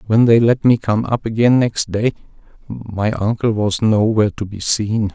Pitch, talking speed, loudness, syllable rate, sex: 110 Hz, 200 wpm, -16 LUFS, 4.6 syllables/s, male